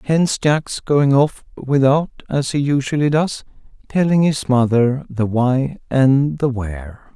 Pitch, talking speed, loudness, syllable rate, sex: 135 Hz, 145 wpm, -17 LUFS, 3.9 syllables/s, male